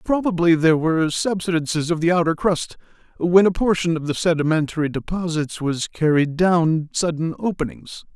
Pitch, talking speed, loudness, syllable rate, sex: 165 Hz, 145 wpm, -20 LUFS, 5.2 syllables/s, male